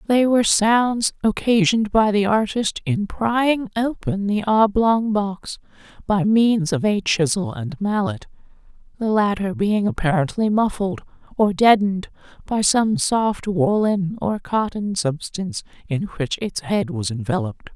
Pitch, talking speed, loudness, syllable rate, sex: 205 Hz, 130 wpm, -20 LUFS, 4.2 syllables/s, female